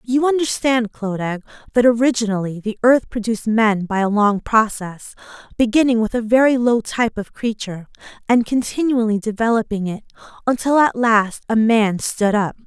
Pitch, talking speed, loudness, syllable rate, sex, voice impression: 225 Hz, 150 wpm, -18 LUFS, 5.1 syllables/s, female, feminine, adult-like, clear, slightly sincere, slightly sharp